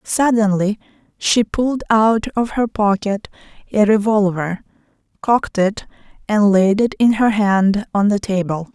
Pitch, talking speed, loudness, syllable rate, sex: 210 Hz, 135 wpm, -17 LUFS, 4.2 syllables/s, female